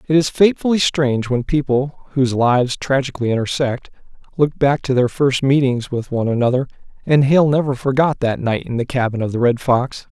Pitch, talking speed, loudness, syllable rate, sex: 130 Hz, 190 wpm, -17 LUFS, 5.7 syllables/s, male